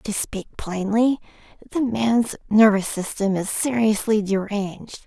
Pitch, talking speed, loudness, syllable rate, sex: 215 Hz, 120 wpm, -21 LUFS, 4.0 syllables/s, female